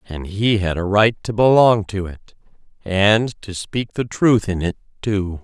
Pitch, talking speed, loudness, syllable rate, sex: 100 Hz, 175 wpm, -18 LUFS, 4.0 syllables/s, male